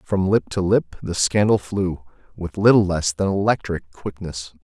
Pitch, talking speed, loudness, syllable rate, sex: 95 Hz, 170 wpm, -20 LUFS, 4.4 syllables/s, male